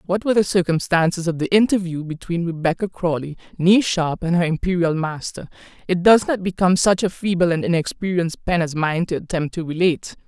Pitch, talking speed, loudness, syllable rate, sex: 175 Hz, 185 wpm, -20 LUFS, 5.8 syllables/s, female